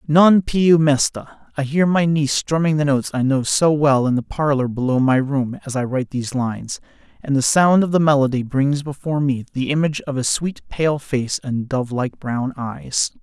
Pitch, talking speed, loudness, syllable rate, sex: 140 Hz, 205 wpm, -19 LUFS, 5.1 syllables/s, male